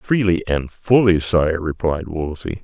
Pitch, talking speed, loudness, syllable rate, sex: 90 Hz, 135 wpm, -19 LUFS, 3.9 syllables/s, male